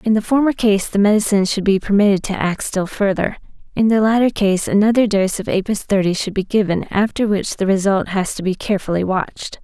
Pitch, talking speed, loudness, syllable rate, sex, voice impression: 200 Hz, 210 wpm, -17 LUFS, 5.8 syllables/s, female, feminine, gender-neutral, slightly young, slightly adult-like, slightly thin, slightly relaxed, slightly weak, slightly dark, slightly hard, slightly clear, fluent, slightly cute, slightly intellectual, slightly sincere, calm, very elegant, slightly strict, slightly sharp